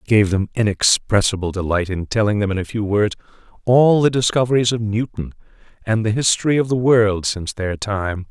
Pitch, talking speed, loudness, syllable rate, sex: 105 Hz, 190 wpm, -18 LUFS, 5.5 syllables/s, male